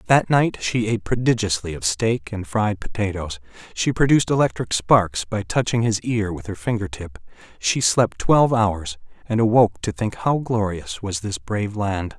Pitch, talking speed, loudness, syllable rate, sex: 105 Hz, 175 wpm, -21 LUFS, 4.8 syllables/s, male